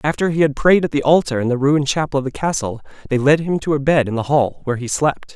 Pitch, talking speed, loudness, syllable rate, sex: 140 Hz, 290 wpm, -17 LUFS, 6.5 syllables/s, male